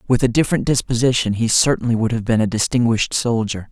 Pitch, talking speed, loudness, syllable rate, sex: 115 Hz, 195 wpm, -18 LUFS, 6.5 syllables/s, male